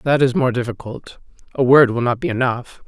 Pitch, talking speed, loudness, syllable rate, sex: 140 Hz, 210 wpm, -17 LUFS, 5.3 syllables/s, female